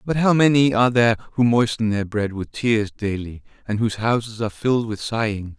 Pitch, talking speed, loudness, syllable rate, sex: 110 Hz, 205 wpm, -20 LUFS, 5.7 syllables/s, male